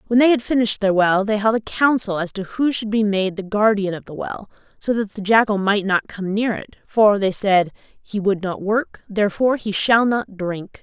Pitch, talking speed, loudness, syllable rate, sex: 205 Hz, 235 wpm, -19 LUFS, 5.0 syllables/s, female